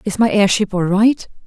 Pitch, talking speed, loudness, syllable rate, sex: 200 Hz, 205 wpm, -15 LUFS, 4.9 syllables/s, female